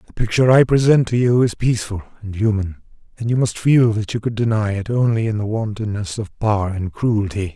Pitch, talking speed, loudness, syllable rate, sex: 110 Hz, 215 wpm, -18 LUFS, 5.7 syllables/s, male